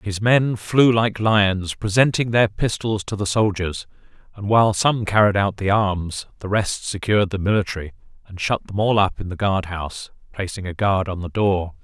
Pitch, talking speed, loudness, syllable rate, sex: 100 Hz, 195 wpm, -20 LUFS, 4.8 syllables/s, male